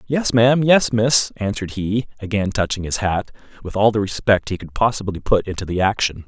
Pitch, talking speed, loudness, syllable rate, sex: 105 Hz, 200 wpm, -19 LUFS, 5.6 syllables/s, male